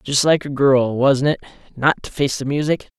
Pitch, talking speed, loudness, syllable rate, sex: 140 Hz, 200 wpm, -18 LUFS, 4.9 syllables/s, male